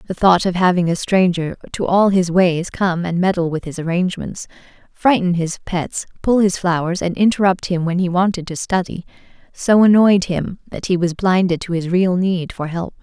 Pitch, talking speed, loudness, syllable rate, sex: 180 Hz, 200 wpm, -17 LUFS, 5.0 syllables/s, female